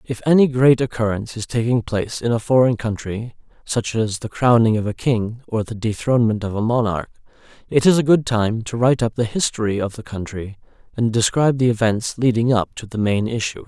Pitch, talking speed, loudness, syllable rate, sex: 115 Hz, 205 wpm, -19 LUFS, 5.6 syllables/s, male